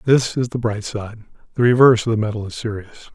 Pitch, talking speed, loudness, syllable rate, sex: 115 Hz, 230 wpm, -18 LUFS, 6.6 syllables/s, male